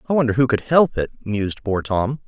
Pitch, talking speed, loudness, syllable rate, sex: 120 Hz, 240 wpm, -20 LUFS, 5.5 syllables/s, male